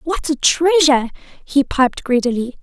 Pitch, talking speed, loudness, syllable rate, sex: 285 Hz, 135 wpm, -16 LUFS, 4.5 syllables/s, female